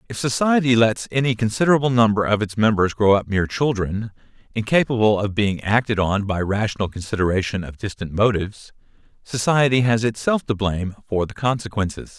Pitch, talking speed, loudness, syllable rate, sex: 110 Hz, 160 wpm, -20 LUFS, 5.8 syllables/s, male